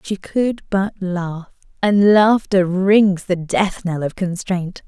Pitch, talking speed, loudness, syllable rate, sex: 190 Hz, 150 wpm, -18 LUFS, 3.2 syllables/s, female